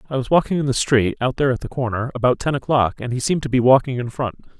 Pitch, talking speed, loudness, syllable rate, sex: 130 Hz, 285 wpm, -19 LUFS, 7.1 syllables/s, male